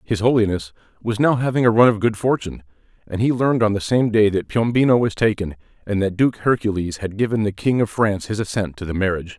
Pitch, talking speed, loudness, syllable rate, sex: 105 Hz, 230 wpm, -19 LUFS, 6.3 syllables/s, male